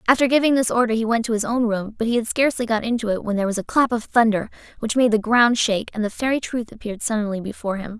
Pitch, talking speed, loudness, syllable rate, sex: 225 Hz, 280 wpm, -21 LUFS, 7.1 syllables/s, female